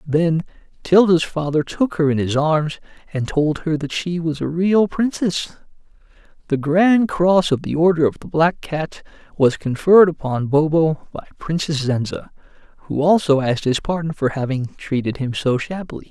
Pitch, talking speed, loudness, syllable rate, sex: 155 Hz, 170 wpm, -19 LUFS, 4.7 syllables/s, male